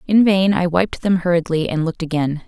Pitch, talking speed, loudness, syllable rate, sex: 175 Hz, 220 wpm, -18 LUFS, 5.7 syllables/s, female